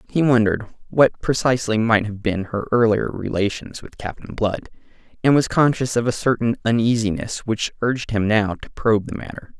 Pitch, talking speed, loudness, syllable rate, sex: 115 Hz, 175 wpm, -20 LUFS, 5.5 syllables/s, male